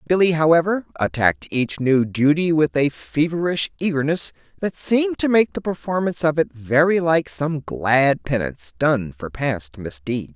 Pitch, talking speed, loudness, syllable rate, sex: 145 Hz, 155 wpm, -20 LUFS, 4.7 syllables/s, male